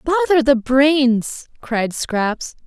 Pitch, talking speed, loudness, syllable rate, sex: 255 Hz, 115 wpm, -17 LUFS, 3.5 syllables/s, female